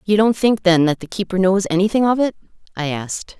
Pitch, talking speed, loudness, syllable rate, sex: 195 Hz, 230 wpm, -18 LUFS, 5.9 syllables/s, female